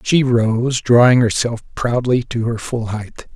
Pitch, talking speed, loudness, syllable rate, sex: 120 Hz, 160 wpm, -16 LUFS, 3.7 syllables/s, male